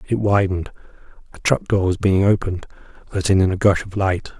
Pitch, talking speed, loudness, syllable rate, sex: 95 Hz, 190 wpm, -19 LUFS, 6.1 syllables/s, male